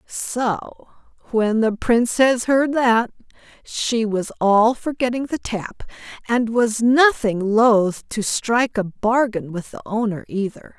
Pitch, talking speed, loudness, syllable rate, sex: 230 Hz, 140 wpm, -19 LUFS, 3.5 syllables/s, female